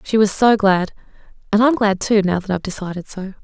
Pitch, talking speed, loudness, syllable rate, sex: 200 Hz, 210 wpm, -17 LUFS, 6.0 syllables/s, female